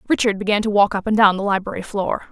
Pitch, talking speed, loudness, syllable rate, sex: 205 Hz, 260 wpm, -18 LUFS, 6.6 syllables/s, female